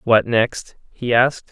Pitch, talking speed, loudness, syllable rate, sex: 120 Hz, 160 wpm, -18 LUFS, 4.0 syllables/s, male